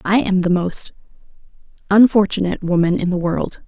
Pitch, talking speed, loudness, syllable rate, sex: 190 Hz, 145 wpm, -17 LUFS, 5.4 syllables/s, female